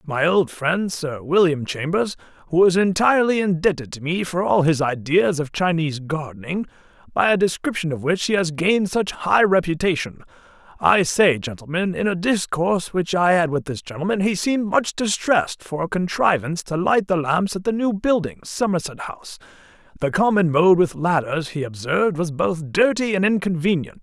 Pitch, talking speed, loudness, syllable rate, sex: 175 Hz, 175 wpm, -20 LUFS, 5.2 syllables/s, male